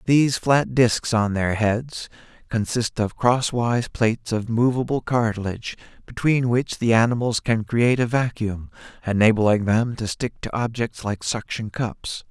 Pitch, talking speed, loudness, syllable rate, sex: 115 Hz, 145 wpm, -22 LUFS, 4.4 syllables/s, male